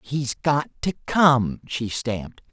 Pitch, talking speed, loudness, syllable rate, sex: 130 Hz, 145 wpm, -23 LUFS, 3.5 syllables/s, male